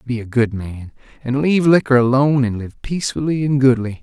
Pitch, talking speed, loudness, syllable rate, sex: 130 Hz, 195 wpm, -17 LUFS, 5.6 syllables/s, male